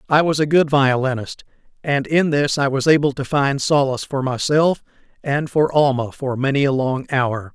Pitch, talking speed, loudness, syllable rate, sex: 140 Hz, 190 wpm, -18 LUFS, 4.9 syllables/s, male